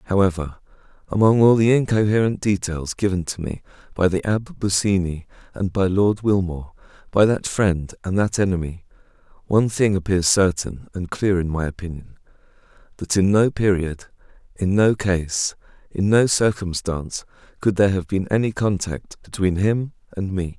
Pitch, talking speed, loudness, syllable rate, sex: 95 Hz, 150 wpm, -21 LUFS, 5.0 syllables/s, male